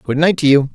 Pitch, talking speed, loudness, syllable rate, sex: 150 Hz, 320 wpm, -14 LUFS, 6.4 syllables/s, male